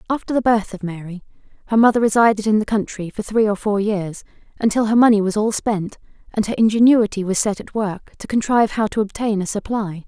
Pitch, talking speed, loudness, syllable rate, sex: 210 Hz, 215 wpm, -18 LUFS, 5.9 syllables/s, female